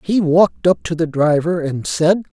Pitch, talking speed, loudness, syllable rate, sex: 165 Hz, 200 wpm, -16 LUFS, 4.6 syllables/s, male